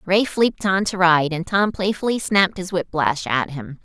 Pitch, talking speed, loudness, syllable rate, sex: 180 Hz, 205 wpm, -20 LUFS, 5.1 syllables/s, female